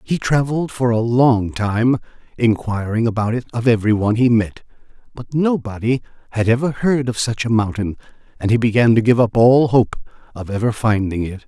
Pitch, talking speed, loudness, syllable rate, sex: 115 Hz, 185 wpm, -17 LUFS, 5.4 syllables/s, male